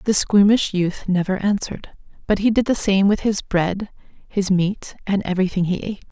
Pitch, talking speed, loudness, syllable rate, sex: 195 Hz, 185 wpm, -20 LUFS, 5.2 syllables/s, female